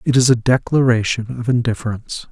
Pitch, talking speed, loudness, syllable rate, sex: 120 Hz, 155 wpm, -17 LUFS, 6.0 syllables/s, male